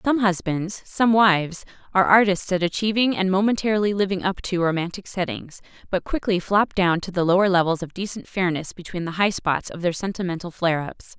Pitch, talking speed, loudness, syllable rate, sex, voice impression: 185 Hz, 190 wpm, -22 LUFS, 5.6 syllables/s, female, feminine, adult-like, tensed, bright, clear, intellectual, slightly friendly, elegant, lively, slightly sharp